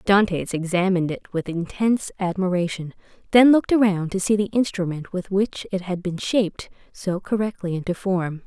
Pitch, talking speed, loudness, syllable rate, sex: 190 Hz, 165 wpm, -22 LUFS, 5.3 syllables/s, female